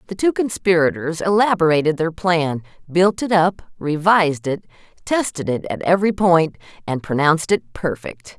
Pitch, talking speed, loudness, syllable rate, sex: 170 Hz, 145 wpm, -19 LUFS, 4.9 syllables/s, female